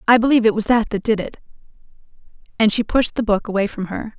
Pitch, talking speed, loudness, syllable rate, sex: 215 Hz, 230 wpm, -18 LUFS, 6.8 syllables/s, female